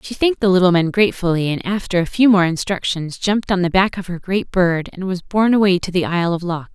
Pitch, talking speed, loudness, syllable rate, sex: 185 Hz, 260 wpm, -17 LUFS, 6.2 syllables/s, female